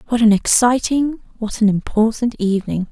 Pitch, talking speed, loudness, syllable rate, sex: 225 Hz, 145 wpm, -17 LUFS, 5.1 syllables/s, female